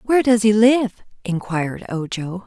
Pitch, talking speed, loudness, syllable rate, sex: 210 Hz, 145 wpm, -19 LUFS, 4.7 syllables/s, female